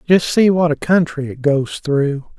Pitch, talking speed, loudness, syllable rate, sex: 155 Hz, 200 wpm, -16 LUFS, 4.0 syllables/s, male